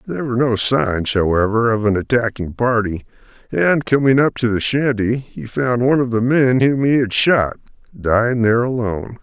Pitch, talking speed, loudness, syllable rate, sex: 120 Hz, 180 wpm, -17 LUFS, 5.3 syllables/s, male